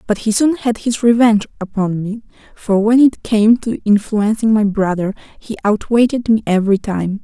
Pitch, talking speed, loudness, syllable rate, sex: 215 Hz, 175 wpm, -15 LUFS, 4.9 syllables/s, female